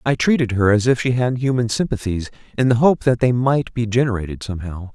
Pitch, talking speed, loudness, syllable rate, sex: 120 Hz, 220 wpm, -19 LUFS, 5.9 syllables/s, male